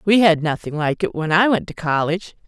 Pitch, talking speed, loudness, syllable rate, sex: 175 Hz, 240 wpm, -19 LUFS, 5.7 syllables/s, female